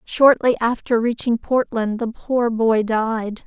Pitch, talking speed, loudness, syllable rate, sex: 230 Hz, 140 wpm, -19 LUFS, 3.6 syllables/s, female